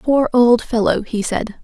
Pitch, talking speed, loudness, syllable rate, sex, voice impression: 235 Hz, 185 wpm, -16 LUFS, 4.0 syllables/s, female, very feminine, adult-like, slightly fluent, slightly intellectual, slightly calm, slightly elegant